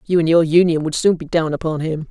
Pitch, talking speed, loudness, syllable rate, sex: 160 Hz, 285 wpm, -17 LUFS, 6.0 syllables/s, female